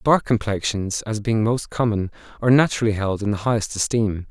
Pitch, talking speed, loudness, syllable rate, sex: 110 Hz, 180 wpm, -21 LUFS, 5.7 syllables/s, male